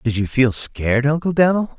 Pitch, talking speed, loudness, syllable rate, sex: 135 Hz, 200 wpm, -18 LUFS, 4.6 syllables/s, male